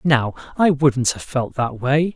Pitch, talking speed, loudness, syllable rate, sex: 140 Hz, 195 wpm, -19 LUFS, 3.9 syllables/s, male